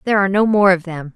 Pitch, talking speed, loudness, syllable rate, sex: 190 Hz, 310 wpm, -15 LUFS, 7.8 syllables/s, female